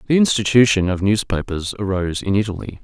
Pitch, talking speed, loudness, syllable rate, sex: 105 Hz, 150 wpm, -18 LUFS, 6.1 syllables/s, male